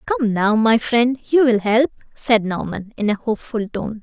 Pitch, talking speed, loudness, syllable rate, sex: 225 Hz, 180 wpm, -18 LUFS, 4.4 syllables/s, female